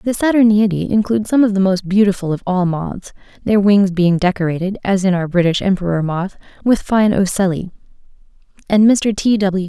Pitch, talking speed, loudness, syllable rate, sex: 195 Hz, 175 wpm, -15 LUFS, 5.4 syllables/s, female